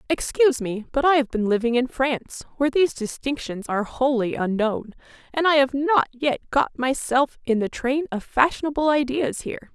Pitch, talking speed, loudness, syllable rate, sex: 265 Hz, 180 wpm, -22 LUFS, 5.2 syllables/s, female